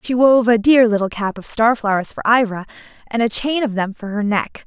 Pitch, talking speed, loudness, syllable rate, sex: 225 Hz, 245 wpm, -17 LUFS, 5.3 syllables/s, female